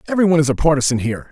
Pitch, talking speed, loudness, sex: 145 Hz, 275 wpm, -16 LUFS, male